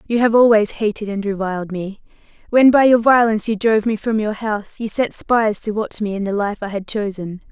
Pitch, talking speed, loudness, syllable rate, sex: 215 Hz, 230 wpm, -17 LUFS, 5.7 syllables/s, female